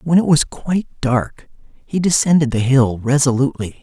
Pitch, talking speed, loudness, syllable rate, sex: 140 Hz, 155 wpm, -16 LUFS, 5.1 syllables/s, male